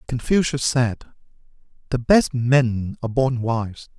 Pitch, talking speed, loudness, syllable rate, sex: 125 Hz, 120 wpm, -20 LUFS, 3.8 syllables/s, male